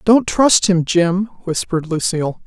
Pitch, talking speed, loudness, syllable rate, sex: 185 Hz, 145 wpm, -16 LUFS, 4.3 syllables/s, female